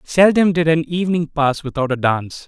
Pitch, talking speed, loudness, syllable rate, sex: 155 Hz, 195 wpm, -17 LUFS, 5.5 syllables/s, male